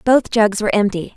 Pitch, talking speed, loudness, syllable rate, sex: 215 Hz, 205 wpm, -16 LUFS, 5.7 syllables/s, female